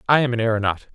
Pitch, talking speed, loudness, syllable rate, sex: 115 Hz, 255 wpm, -20 LUFS, 8.0 syllables/s, male